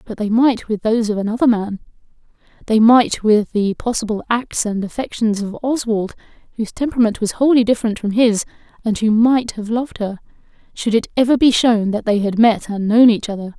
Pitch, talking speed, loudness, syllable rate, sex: 220 Hz, 195 wpm, -17 LUFS, 5.6 syllables/s, female